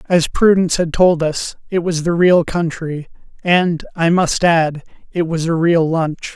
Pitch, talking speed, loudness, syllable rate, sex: 165 Hz, 180 wpm, -16 LUFS, 4.3 syllables/s, male